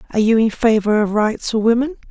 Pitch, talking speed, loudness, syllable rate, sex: 225 Hz, 230 wpm, -16 LUFS, 6.3 syllables/s, female